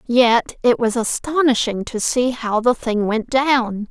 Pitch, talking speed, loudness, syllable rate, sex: 240 Hz, 170 wpm, -18 LUFS, 3.8 syllables/s, female